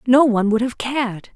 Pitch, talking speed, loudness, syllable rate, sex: 240 Hz, 220 wpm, -18 LUFS, 5.9 syllables/s, female